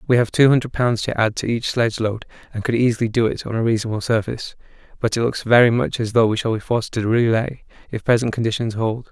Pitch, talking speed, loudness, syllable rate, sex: 115 Hz, 245 wpm, -19 LUFS, 6.5 syllables/s, male